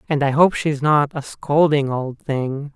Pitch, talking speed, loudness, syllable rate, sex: 145 Hz, 195 wpm, -19 LUFS, 3.9 syllables/s, male